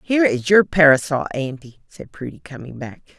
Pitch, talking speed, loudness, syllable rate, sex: 145 Hz, 170 wpm, -17 LUFS, 5.3 syllables/s, female